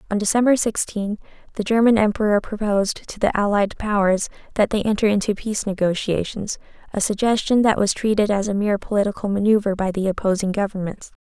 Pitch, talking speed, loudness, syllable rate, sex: 205 Hz, 165 wpm, -20 LUFS, 6.1 syllables/s, female